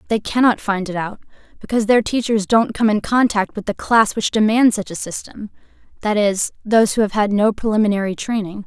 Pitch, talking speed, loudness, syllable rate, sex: 210 Hz, 195 wpm, -18 LUFS, 5.7 syllables/s, female